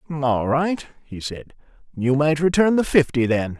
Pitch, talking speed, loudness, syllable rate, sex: 145 Hz, 165 wpm, -20 LUFS, 4.4 syllables/s, male